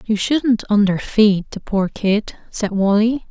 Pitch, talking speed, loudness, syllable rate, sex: 210 Hz, 145 wpm, -18 LUFS, 3.8 syllables/s, female